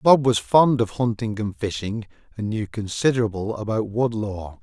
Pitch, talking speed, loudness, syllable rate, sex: 110 Hz, 170 wpm, -23 LUFS, 4.7 syllables/s, male